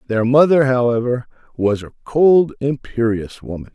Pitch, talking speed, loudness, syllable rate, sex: 125 Hz, 130 wpm, -17 LUFS, 4.5 syllables/s, male